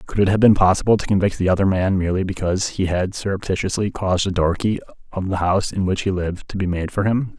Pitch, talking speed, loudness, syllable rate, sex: 95 Hz, 250 wpm, -20 LUFS, 6.7 syllables/s, male